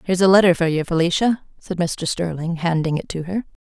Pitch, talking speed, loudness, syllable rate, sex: 175 Hz, 210 wpm, -20 LUFS, 5.9 syllables/s, female